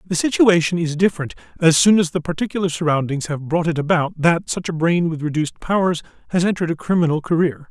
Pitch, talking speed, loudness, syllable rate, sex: 165 Hz, 200 wpm, -19 LUFS, 6.2 syllables/s, male